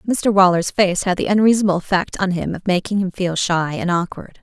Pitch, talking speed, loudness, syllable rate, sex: 185 Hz, 215 wpm, -18 LUFS, 5.7 syllables/s, female